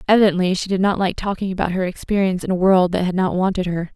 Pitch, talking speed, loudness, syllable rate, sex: 185 Hz, 260 wpm, -19 LUFS, 6.9 syllables/s, female